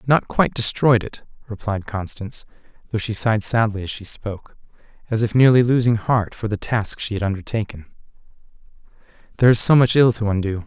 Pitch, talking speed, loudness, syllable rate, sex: 110 Hz, 175 wpm, -19 LUFS, 5.9 syllables/s, male